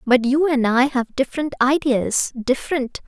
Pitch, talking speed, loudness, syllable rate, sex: 260 Hz, 135 wpm, -19 LUFS, 4.7 syllables/s, female